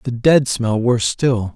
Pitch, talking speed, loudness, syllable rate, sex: 120 Hz, 195 wpm, -17 LUFS, 4.2 syllables/s, male